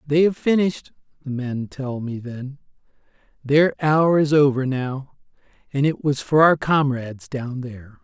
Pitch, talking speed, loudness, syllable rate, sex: 140 Hz, 155 wpm, -21 LUFS, 4.4 syllables/s, male